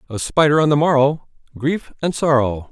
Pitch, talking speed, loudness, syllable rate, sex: 140 Hz, 175 wpm, -17 LUFS, 5.2 syllables/s, male